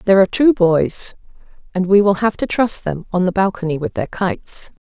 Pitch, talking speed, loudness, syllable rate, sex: 190 Hz, 210 wpm, -17 LUFS, 5.5 syllables/s, female